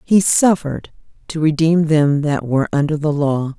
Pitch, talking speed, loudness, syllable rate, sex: 155 Hz, 165 wpm, -16 LUFS, 4.8 syllables/s, female